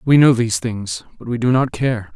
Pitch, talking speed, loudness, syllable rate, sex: 120 Hz, 250 wpm, -18 LUFS, 5.3 syllables/s, male